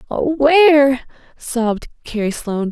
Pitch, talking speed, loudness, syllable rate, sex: 260 Hz, 90 wpm, -16 LUFS, 4.1 syllables/s, female